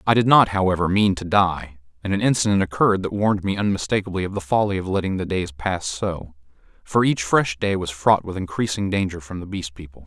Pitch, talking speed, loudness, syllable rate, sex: 95 Hz, 215 wpm, -21 LUFS, 5.9 syllables/s, male